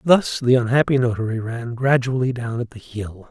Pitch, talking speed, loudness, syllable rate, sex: 120 Hz, 180 wpm, -20 LUFS, 5.0 syllables/s, male